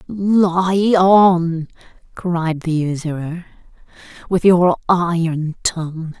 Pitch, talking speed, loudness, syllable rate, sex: 175 Hz, 85 wpm, -17 LUFS, 2.9 syllables/s, female